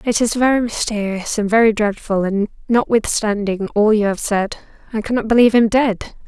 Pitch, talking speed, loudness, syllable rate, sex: 215 Hz, 170 wpm, -17 LUFS, 5.2 syllables/s, female